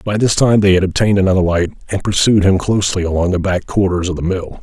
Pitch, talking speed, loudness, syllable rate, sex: 95 Hz, 245 wpm, -15 LUFS, 6.5 syllables/s, male